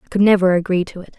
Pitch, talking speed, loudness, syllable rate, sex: 185 Hz, 305 wpm, -16 LUFS, 7.3 syllables/s, female